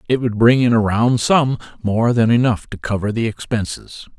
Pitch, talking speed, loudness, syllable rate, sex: 115 Hz, 200 wpm, -17 LUFS, 4.9 syllables/s, male